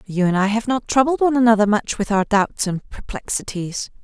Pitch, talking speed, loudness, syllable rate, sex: 215 Hz, 210 wpm, -19 LUFS, 5.5 syllables/s, female